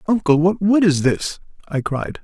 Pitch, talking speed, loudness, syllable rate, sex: 170 Hz, 190 wpm, -18 LUFS, 4.4 syllables/s, male